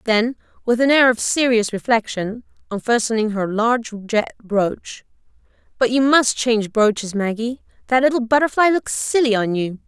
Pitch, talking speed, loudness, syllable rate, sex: 230 Hz, 150 wpm, -18 LUFS, 4.9 syllables/s, female